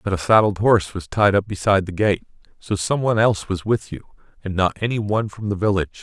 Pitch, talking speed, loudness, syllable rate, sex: 100 Hz, 240 wpm, -20 LUFS, 6.4 syllables/s, male